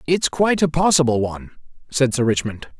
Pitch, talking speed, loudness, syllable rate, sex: 140 Hz, 170 wpm, -19 LUFS, 5.8 syllables/s, male